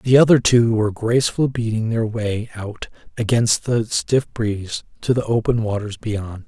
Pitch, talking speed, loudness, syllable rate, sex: 115 Hz, 165 wpm, -19 LUFS, 4.7 syllables/s, male